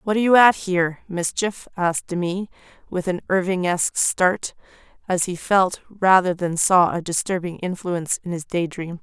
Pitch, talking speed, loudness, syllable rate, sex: 180 Hz, 165 wpm, -21 LUFS, 4.9 syllables/s, female